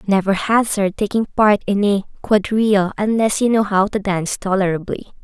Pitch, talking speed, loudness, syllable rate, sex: 205 Hz, 160 wpm, -17 LUFS, 5.1 syllables/s, female